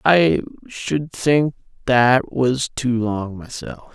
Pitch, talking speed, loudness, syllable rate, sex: 125 Hz, 120 wpm, -19 LUFS, 2.8 syllables/s, male